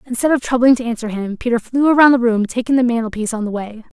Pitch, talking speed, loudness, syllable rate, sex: 240 Hz, 255 wpm, -16 LUFS, 7.1 syllables/s, female